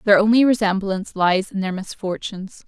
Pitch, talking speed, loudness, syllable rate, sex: 200 Hz, 155 wpm, -20 LUFS, 5.6 syllables/s, female